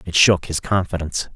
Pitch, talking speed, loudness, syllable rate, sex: 85 Hz, 175 wpm, -19 LUFS, 5.8 syllables/s, male